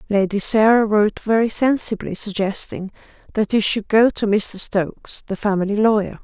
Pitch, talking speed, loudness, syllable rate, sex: 210 Hz, 155 wpm, -19 LUFS, 5.1 syllables/s, female